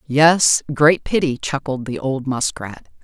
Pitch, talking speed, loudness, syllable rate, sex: 140 Hz, 140 wpm, -18 LUFS, 3.7 syllables/s, female